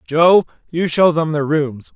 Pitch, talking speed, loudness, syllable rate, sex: 160 Hz, 185 wpm, -16 LUFS, 3.9 syllables/s, male